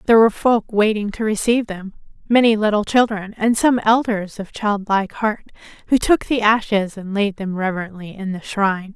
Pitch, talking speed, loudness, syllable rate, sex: 210 Hz, 175 wpm, -18 LUFS, 5.5 syllables/s, female